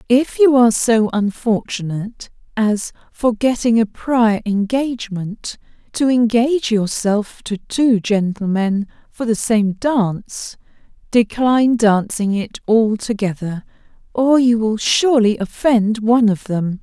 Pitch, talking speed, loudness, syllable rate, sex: 225 Hz, 115 wpm, -17 LUFS, 4.0 syllables/s, female